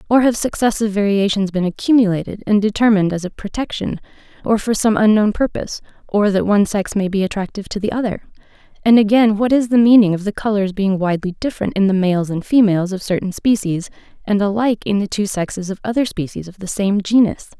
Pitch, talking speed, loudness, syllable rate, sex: 205 Hz, 200 wpm, -17 LUFS, 6.3 syllables/s, female